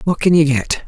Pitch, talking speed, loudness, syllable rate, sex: 155 Hz, 275 wpm, -15 LUFS, 5.2 syllables/s, male